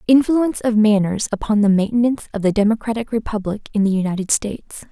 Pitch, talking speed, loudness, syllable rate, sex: 215 Hz, 170 wpm, -18 LUFS, 6.4 syllables/s, female